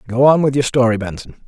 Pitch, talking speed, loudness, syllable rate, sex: 125 Hz, 245 wpm, -15 LUFS, 6.2 syllables/s, male